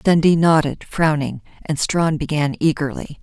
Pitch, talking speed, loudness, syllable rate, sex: 155 Hz, 130 wpm, -19 LUFS, 4.3 syllables/s, female